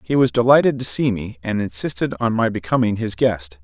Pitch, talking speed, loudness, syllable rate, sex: 110 Hz, 215 wpm, -19 LUFS, 5.4 syllables/s, male